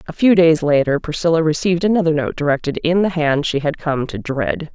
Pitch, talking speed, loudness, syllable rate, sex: 160 Hz, 215 wpm, -17 LUFS, 5.7 syllables/s, female